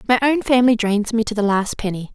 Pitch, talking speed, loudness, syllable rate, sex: 225 Hz, 250 wpm, -18 LUFS, 6.3 syllables/s, female